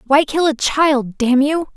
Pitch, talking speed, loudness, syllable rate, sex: 280 Hz, 205 wpm, -16 LUFS, 3.9 syllables/s, female